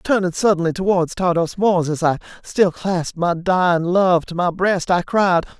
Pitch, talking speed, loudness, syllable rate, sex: 180 Hz, 180 wpm, -18 LUFS, 4.7 syllables/s, female